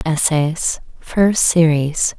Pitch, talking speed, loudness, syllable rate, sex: 160 Hz, 85 wpm, -16 LUFS, 2.6 syllables/s, female